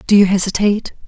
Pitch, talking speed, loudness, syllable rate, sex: 200 Hz, 170 wpm, -15 LUFS, 7.1 syllables/s, female